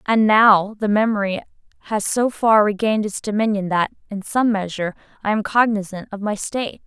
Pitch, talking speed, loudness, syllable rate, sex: 210 Hz, 175 wpm, -19 LUFS, 5.4 syllables/s, female